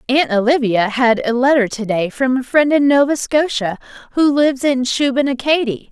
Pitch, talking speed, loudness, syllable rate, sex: 255 Hz, 160 wpm, -16 LUFS, 5.1 syllables/s, female